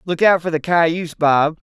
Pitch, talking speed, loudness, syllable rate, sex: 165 Hz, 210 wpm, -17 LUFS, 4.6 syllables/s, male